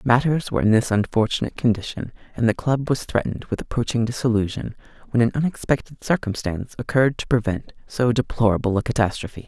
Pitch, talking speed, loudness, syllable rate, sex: 120 Hz, 160 wpm, -22 LUFS, 6.4 syllables/s, male